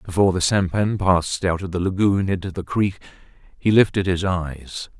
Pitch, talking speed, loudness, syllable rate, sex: 95 Hz, 180 wpm, -21 LUFS, 5.2 syllables/s, male